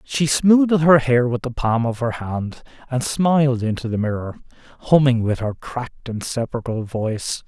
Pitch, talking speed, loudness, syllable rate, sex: 125 Hz, 175 wpm, -20 LUFS, 4.8 syllables/s, male